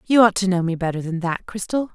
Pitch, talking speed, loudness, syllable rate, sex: 190 Hz, 280 wpm, -21 LUFS, 6.0 syllables/s, female